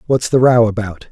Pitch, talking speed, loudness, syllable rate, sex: 115 Hz, 215 wpm, -14 LUFS, 5.3 syllables/s, male